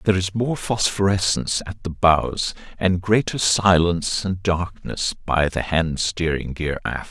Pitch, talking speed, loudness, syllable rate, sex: 90 Hz, 150 wpm, -21 LUFS, 4.3 syllables/s, male